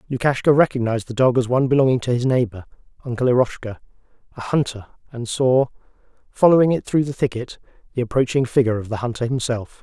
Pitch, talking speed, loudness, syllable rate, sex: 125 Hz, 170 wpm, -20 LUFS, 6.6 syllables/s, male